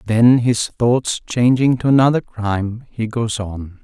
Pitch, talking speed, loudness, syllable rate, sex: 115 Hz, 155 wpm, -17 LUFS, 3.9 syllables/s, male